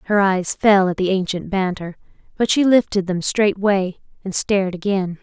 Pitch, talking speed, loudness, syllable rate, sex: 195 Hz, 170 wpm, -18 LUFS, 4.8 syllables/s, female